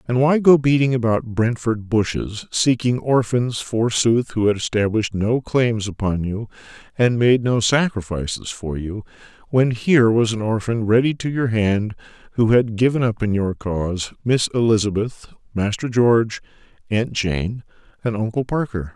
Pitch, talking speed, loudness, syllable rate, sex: 115 Hz, 150 wpm, -20 LUFS, 4.6 syllables/s, male